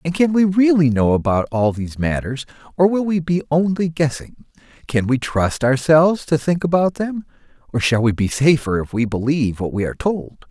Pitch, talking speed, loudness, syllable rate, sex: 145 Hz, 200 wpm, -18 LUFS, 5.3 syllables/s, male